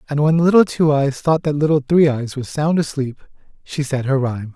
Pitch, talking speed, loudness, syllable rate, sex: 145 Hz, 225 wpm, -17 LUFS, 5.3 syllables/s, male